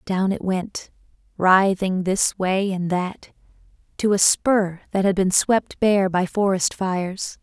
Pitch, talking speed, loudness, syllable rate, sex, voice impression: 190 Hz, 155 wpm, -20 LUFS, 3.6 syllables/s, female, very feminine, slightly young, slightly clear, slightly cute, friendly